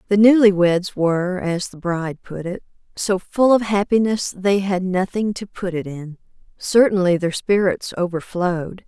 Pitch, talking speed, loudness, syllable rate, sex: 190 Hz, 160 wpm, -19 LUFS, 4.6 syllables/s, female